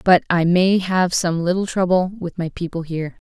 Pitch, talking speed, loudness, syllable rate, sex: 175 Hz, 200 wpm, -19 LUFS, 5.0 syllables/s, female